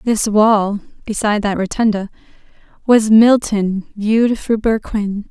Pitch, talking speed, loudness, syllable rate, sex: 210 Hz, 115 wpm, -15 LUFS, 4.2 syllables/s, female